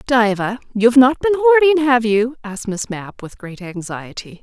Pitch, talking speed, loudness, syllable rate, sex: 235 Hz, 175 wpm, -16 LUFS, 5.5 syllables/s, female